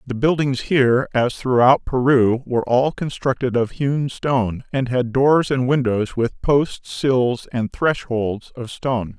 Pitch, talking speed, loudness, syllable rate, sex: 125 Hz, 155 wpm, -19 LUFS, 4.0 syllables/s, male